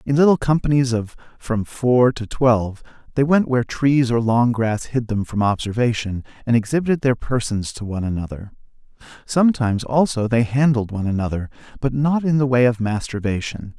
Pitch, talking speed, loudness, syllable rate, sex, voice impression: 120 Hz, 170 wpm, -20 LUFS, 5.5 syllables/s, male, masculine, adult-like, fluent, slightly cool, refreshing, sincere, slightly kind